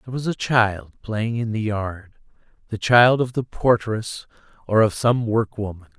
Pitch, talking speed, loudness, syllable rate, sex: 110 Hz, 170 wpm, -21 LUFS, 4.4 syllables/s, male